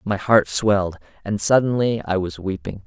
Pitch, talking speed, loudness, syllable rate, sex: 100 Hz, 170 wpm, -20 LUFS, 4.9 syllables/s, male